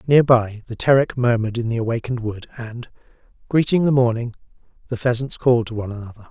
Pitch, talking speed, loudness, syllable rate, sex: 120 Hz, 180 wpm, -20 LUFS, 6.5 syllables/s, male